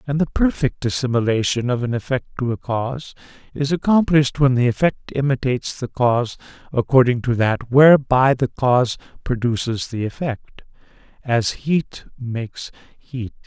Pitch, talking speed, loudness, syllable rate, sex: 130 Hz, 140 wpm, -19 LUFS, 4.9 syllables/s, male